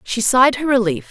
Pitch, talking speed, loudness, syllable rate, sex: 230 Hz, 215 wpm, -15 LUFS, 6.0 syllables/s, female